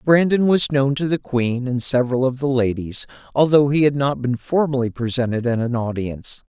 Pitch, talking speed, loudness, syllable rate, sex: 130 Hz, 195 wpm, -19 LUFS, 5.3 syllables/s, male